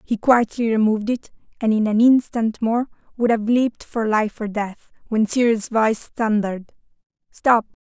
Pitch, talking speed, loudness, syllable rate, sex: 225 Hz, 160 wpm, -20 LUFS, 4.6 syllables/s, female